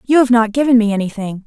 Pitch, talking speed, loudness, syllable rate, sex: 230 Hz, 245 wpm, -14 LUFS, 6.8 syllables/s, female